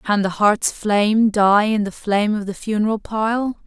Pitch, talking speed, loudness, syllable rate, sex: 210 Hz, 195 wpm, -18 LUFS, 4.6 syllables/s, female